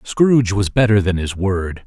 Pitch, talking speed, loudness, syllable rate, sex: 100 Hz, 195 wpm, -17 LUFS, 4.5 syllables/s, male